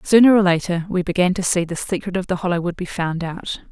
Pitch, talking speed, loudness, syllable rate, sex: 180 Hz, 260 wpm, -19 LUFS, 5.9 syllables/s, female